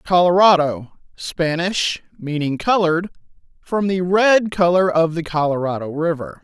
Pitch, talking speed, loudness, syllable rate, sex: 170 Hz, 105 wpm, -18 LUFS, 4.5 syllables/s, male